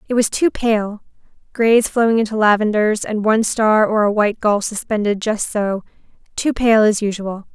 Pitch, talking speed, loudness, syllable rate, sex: 215 Hz, 160 wpm, -17 LUFS, 4.9 syllables/s, female